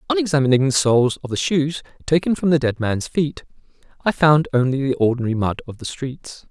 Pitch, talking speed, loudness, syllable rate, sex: 145 Hz, 205 wpm, -19 LUFS, 5.7 syllables/s, male